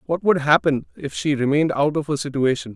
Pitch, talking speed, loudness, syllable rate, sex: 145 Hz, 220 wpm, -20 LUFS, 6.0 syllables/s, male